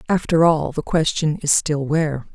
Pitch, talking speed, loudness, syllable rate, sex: 155 Hz, 180 wpm, -19 LUFS, 4.8 syllables/s, female